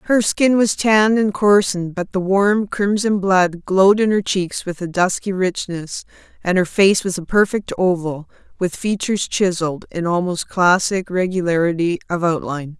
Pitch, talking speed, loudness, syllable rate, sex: 185 Hz, 165 wpm, -18 LUFS, 4.8 syllables/s, female